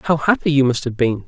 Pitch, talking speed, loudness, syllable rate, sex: 135 Hz, 285 wpm, -17 LUFS, 5.7 syllables/s, male